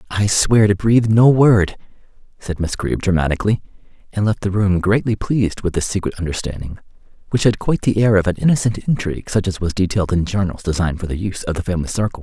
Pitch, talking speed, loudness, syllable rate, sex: 100 Hz, 210 wpm, -18 LUFS, 6.5 syllables/s, male